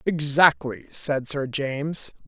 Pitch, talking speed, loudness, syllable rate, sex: 145 Hz, 105 wpm, -23 LUFS, 3.6 syllables/s, male